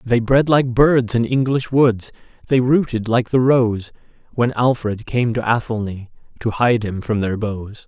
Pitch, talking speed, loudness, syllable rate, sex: 120 Hz, 175 wpm, -18 LUFS, 4.2 syllables/s, male